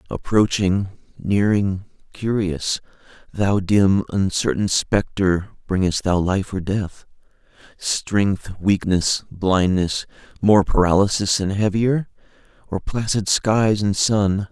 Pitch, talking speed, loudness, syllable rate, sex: 100 Hz, 95 wpm, -20 LUFS, 3.4 syllables/s, male